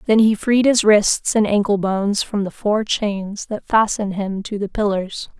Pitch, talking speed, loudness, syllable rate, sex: 205 Hz, 200 wpm, -18 LUFS, 4.5 syllables/s, female